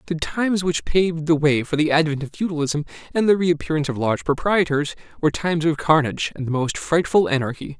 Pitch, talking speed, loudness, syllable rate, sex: 155 Hz, 200 wpm, -21 LUFS, 6.3 syllables/s, male